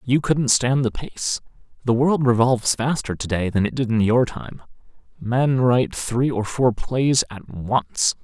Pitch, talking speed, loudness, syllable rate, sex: 120 Hz, 175 wpm, -21 LUFS, 4.1 syllables/s, male